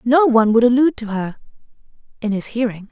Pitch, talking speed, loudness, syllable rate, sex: 235 Hz, 185 wpm, -17 LUFS, 6.5 syllables/s, female